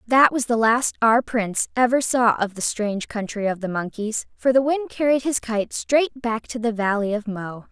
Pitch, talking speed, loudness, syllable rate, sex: 230 Hz, 220 wpm, -21 LUFS, 4.8 syllables/s, female